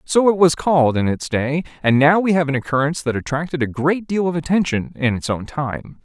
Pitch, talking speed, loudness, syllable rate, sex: 150 Hz, 240 wpm, -18 LUFS, 5.6 syllables/s, male